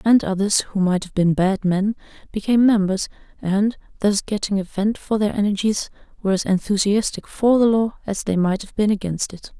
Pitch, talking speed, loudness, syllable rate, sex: 200 Hz, 195 wpm, -20 LUFS, 5.3 syllables/s, female